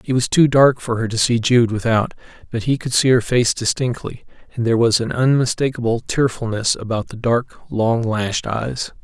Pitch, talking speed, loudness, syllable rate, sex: 120 Hz, 195 wpm, -18 LUFS, 5.0 syllables/s, male